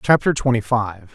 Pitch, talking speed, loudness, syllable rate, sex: 120 Hz, 155 wpm, -19 LUFS, 4.8 syllables/s, male